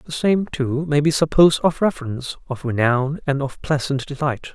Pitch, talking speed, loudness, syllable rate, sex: 145 Hz, 185 wpm, -20 LUFS, 5.3 syllables/s, male